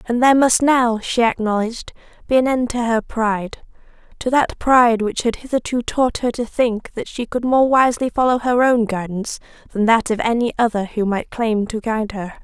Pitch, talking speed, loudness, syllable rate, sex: 235 Hz, 200 wpm, -18 LUFS, 5.3 syllables/s, female